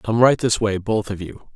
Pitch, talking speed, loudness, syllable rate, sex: 110 Hz, 270 wpm, -20 LUFS, 4.7 syllables/s, male